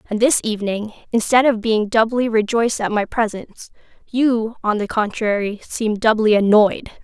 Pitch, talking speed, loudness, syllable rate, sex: 220 Hz, 155 wpm, -18 LUFS, 4.9 syllables/s, female